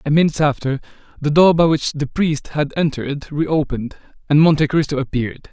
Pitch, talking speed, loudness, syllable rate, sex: 150 Hz, 175 wpm, -18 LUFS, 5.9 syllables/s, male